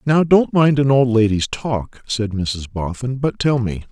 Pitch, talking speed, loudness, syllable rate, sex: 120 Hz, 200 wpm, -18 LUFS, 4.1 syllables/s, male